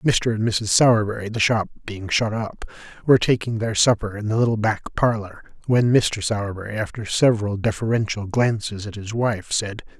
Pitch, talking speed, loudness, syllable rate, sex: 110 Hz, 160 wpm, -21 LUFS, 5.2 syllables/s, male